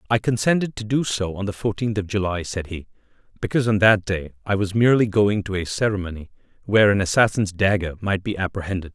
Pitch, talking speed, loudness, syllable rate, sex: 100 Hz, 200 wpm, -21 LUFS, 6.3 syllables/s, male